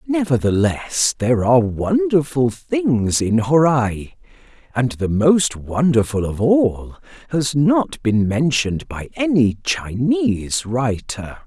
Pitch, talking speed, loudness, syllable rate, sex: 135 Hz, 110 wpm, -18 LUFS, 3.6 syllables/s, male